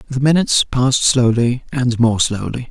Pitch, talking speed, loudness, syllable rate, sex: 125 Hz, 155 wpm, -15 LUFS, 4.9 syllables/s, male